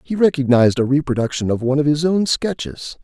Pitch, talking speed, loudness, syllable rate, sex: 145 Hz, 200 wpm, -18 LUFS, 6.2 syllables/s, male